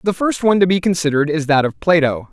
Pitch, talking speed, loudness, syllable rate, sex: 165 Hz, 260 wpm, -16 LUFS, 6.9 syllables/s, male